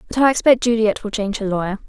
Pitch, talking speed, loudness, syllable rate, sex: 220 Hz, 255 wpm, -18 LUFS, 7.1 syllables/s, female